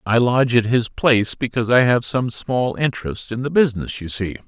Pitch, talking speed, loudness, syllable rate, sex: 120 Hz, 215 wpm, -19 LUFS, 5.6 syllables/s, male